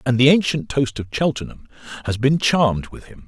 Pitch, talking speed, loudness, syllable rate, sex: 130 Hz, 200 wpm, -19 LUFS, 5.6 syllables/s, male